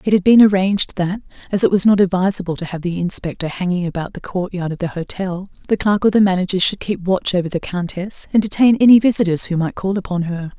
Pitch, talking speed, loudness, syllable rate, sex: 185 Hz, 230 wpm, -17 LUFS, 6.2 syllables/s, female